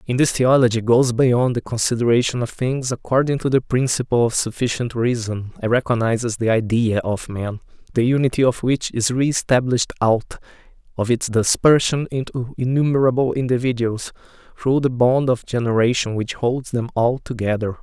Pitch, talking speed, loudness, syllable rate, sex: 120 Hz, 150 wpm, -19 LUFS, 5.2 syllables/s, male